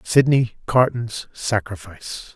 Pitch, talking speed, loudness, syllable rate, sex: 110 Hz, 75 wpm, -21 LUFS, 3.8 syllables/s, male